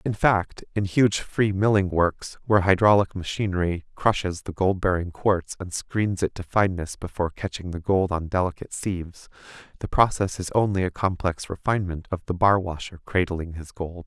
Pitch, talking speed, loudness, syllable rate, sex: 95 Hz, 175 wpm, -24 LUFS, 5.2 syllables/s, male